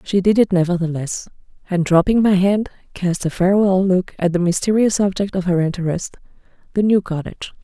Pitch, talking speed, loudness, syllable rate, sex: 185 Hz, 165 wpm, -18 LUFS, 5.7 syllables/s, female